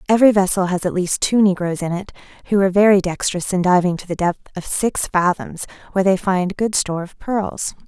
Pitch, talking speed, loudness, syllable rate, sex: 190 Hz, 215 wpm, -18 LUFS, 5.8 syllables/s, female